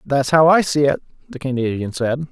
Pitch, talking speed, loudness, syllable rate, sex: 140 Hz, 205 wpm, -17 LUFS, 5.2 syllables/s, male